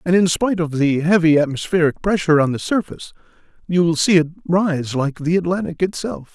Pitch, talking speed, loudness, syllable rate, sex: 170 Hz, 190 wpm, -18 LUFS, 5.8 syllables/s, male